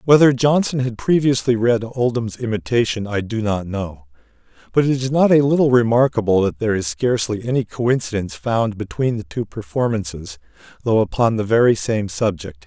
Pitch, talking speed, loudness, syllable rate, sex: 120 Hz, 165 wpm, -19 LUFS, 5.3 syllables/s, male